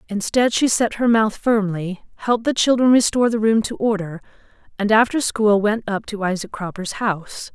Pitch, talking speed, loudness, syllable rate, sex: 215 Hz, 185 wpm, -19 LUFS, 5.1 syllables/s, female